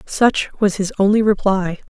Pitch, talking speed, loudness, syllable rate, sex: 200 Hz, 155 wpm, -17 LUFS, 4.6 syllables/s, female